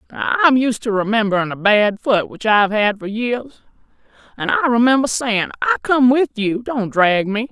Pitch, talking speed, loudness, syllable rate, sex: 230 Hz, 200 wpm, -17 LUFS, 4.8 syllables/s, female